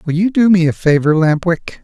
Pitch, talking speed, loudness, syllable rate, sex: 170 Hz, 260 wpm, -13 LUFS, 5.3 syllables/s, male